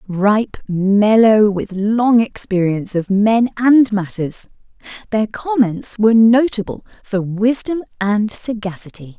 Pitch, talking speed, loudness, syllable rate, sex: 210 Hz, 110 wpm, -16 LUFS, 3.8 syllables/s, female